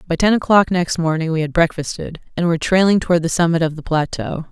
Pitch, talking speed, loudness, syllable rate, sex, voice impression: 165 Hz, 225 wpm, -17 LUFS, 6.2 syllables/s, female, very feminine, very adult-like, very middle-aged, slightly thin, slightly relaxed, slightly powerful, slightly bright, hard, clear, fluent, cool, intellectual, refreshing, very sincere, very calm, slightly friendly, very reassuring, slightly unique, elegant, slightly wild, slightly sweet, kind, sharp, slightly modest